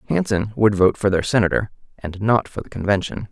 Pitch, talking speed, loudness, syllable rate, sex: 105 Hz, 200 wpm, -19 LUFS, 5.7 syllables/s, male